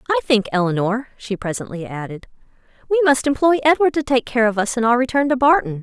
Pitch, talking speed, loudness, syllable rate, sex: 250 Hz, 205 wpm, -18 LUFS, 6.0 syllables/s, female